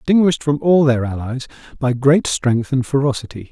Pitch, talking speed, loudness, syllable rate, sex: 135 Hz, 170 wpm, -17 LUFS, 5.5 syllables/s, male